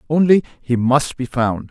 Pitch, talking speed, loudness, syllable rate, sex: 135 Hz, 140 wpm, -17 LUFS, 4.2 syllables/s, male